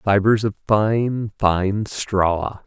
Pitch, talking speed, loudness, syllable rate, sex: 105 Hz, 110 wpm, -20 LUFS, 2.5 syllables/s, male